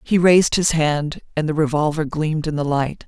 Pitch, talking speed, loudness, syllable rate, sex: 155 Hz, 215 wpm, -19 LUFS, 5.2 syllables/s, female